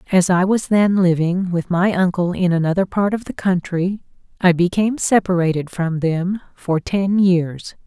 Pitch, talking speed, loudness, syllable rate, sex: 180 Hz, 170 wpm, -18 LUFS, 4.5 syllables/s, female